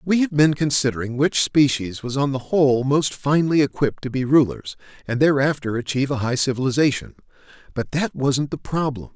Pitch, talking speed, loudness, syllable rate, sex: 135 Hz, 175 wpm, -20 LUFS, 5.6 syllables/s, male